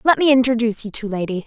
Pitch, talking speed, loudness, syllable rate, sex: 235 Hz, 245 wpm, -18 LUFS, 7.4 syllables/s, female